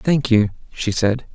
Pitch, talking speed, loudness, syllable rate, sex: 120 Hz, 180 wpm, -19 LUFS, 3.8 syllables/s, male